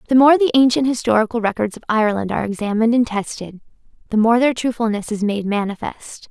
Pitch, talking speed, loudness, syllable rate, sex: 225 Hz, 180 wpm, -18 LUFS, 6.4 syllables/s, female